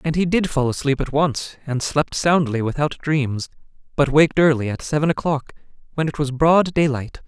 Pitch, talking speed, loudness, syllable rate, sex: 145 Hz, 190 wpm, -20 LUFS, 5.1 syllables/s, male